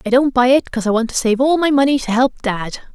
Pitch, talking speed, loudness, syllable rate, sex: 250 Hz, 305 wpm, -16 LUFS, 6.8 syllables/s, female